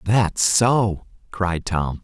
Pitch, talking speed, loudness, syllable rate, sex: 95 Hz, 120 wpm, -20 LUFS, 2.4 syllables/s, male